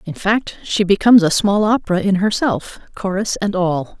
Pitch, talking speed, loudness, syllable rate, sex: 195 Hz, 180 wpm, -16 LUFS, 4.9 syllables/s, female